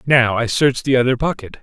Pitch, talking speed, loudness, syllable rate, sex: 125 Hz, 220 wpm, -17 LUFS, 5.2 syllables/s, male